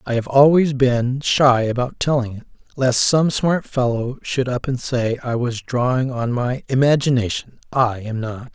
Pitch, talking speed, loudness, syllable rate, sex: 125 Hz, 175 wpm, -19 LUFS, 4.3 syllables/s, male